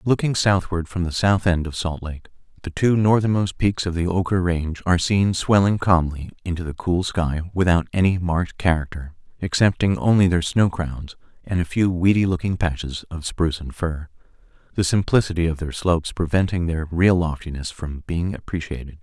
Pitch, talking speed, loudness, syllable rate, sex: 90 Hz, 175 wpm, -21 LUFS, 5.2 syllables/s, male